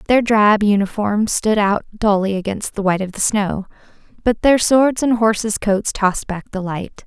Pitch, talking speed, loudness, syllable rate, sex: 210 Hz, 185 wpm, -17 LUFS, 4.5 syllables/s, female